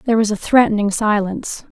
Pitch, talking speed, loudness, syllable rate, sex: 215 Hz, 170 wpm, -17 LUFS, 6.1 syllables/s, female